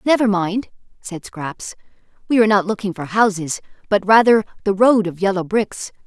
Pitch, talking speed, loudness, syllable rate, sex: 200 Hz, 170 wpm, -18 LUFS, 5.0 syllables/s, female